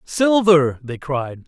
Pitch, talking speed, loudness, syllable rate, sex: 155 Hz, 120 wpm, -17 LUFS, 3.0 syllables/s, male